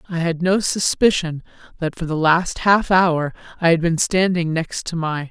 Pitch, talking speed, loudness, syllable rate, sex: 170 Hz, 190 wpm, -19 LUFS, 4.5 syllables/s, female